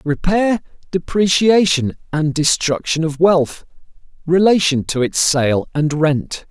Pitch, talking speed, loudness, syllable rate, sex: 160 Hz, 110 wpm, -16 LUFS, 3.8 syllables/s, male